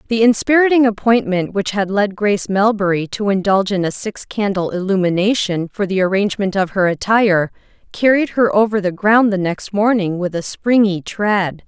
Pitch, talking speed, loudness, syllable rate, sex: 200 Hz, 170 wpm, -16 LUFS, 5.2 syllables/s, female